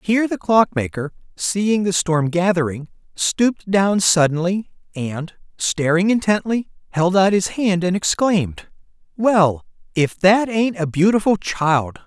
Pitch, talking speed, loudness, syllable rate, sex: 185 Hz, 130 wpm, -18 LUFS, 4.1 syllables/s, male